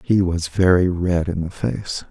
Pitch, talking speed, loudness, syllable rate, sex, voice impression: 90 Hz, 200 wpm, -20 LUFS, 4.0 syllables/s, male, masculine, adult-like, slightly dark, muffled, calm, reassuring, slightly elegant, slightly sweet, kind